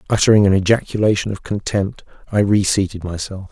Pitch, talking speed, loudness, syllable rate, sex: 100 Hz, 135 wpm, -17 LUFS, 5.9 syllables/s, male